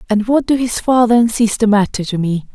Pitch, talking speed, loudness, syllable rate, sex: 220 Hz, 235 wpm, -14 LUFS, 5.8 syllables/s, female